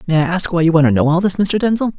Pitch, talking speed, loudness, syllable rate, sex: 175 Hz, 360 wpm, -15 LUFS, 7.1 syllables/s, male